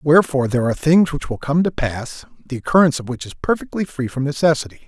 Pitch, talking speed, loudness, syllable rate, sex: 140 Hz, 220 wpm, -19 LUFS, 6.7 syllables/s, male